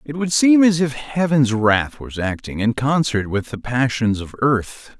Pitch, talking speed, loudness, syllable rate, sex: 130 Hz, 190 wpm, -18 LUFS, 4.1 syllables/s, male